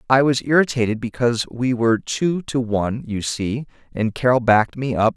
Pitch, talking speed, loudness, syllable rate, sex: 120 Hz, 185 wpm, -20 LUFS, 5.3 syllables/s, male